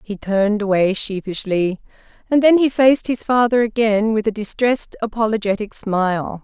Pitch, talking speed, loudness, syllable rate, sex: 215 Hz, 150 wpm, -18 LUFS, 5.2 syllables/s, female